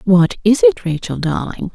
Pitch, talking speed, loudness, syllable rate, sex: 210 Hz, 170 wpm, -16 LUFS, 4.6 syllables/s, female